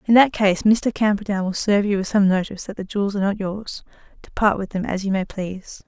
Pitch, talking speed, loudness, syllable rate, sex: 200 Hz, 245 wpm, -21 LUFS, 6.3 syllables/s, female